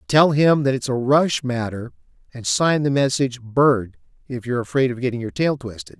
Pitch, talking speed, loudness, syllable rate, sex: 130 Hz, 210 wpm, -20 LUFS, 5.5 syllables/s, male